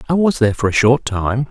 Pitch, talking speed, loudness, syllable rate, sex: 125 Hz, 280 wpm, -16 LUFS, 6.0 syllables/s, male